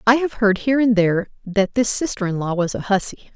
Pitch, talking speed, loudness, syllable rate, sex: 210 Hz, 250 wpm, -19 LUFS, 6.2 syllables/s, female